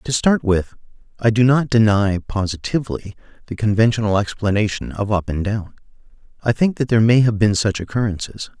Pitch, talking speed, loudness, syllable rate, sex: 110 Hz, 155 wpm, -18 LUFS, 5.6 syllables/s, male